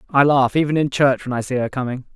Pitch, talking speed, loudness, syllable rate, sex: 135 Hz, 280 wpm, -19 LUFS, 6.3 syllables/s, male